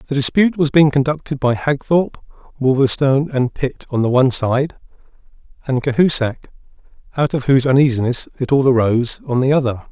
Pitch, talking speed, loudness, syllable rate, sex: 135 Hz, 155 wpm, -16 LUFS, 5.9 syllables/s, male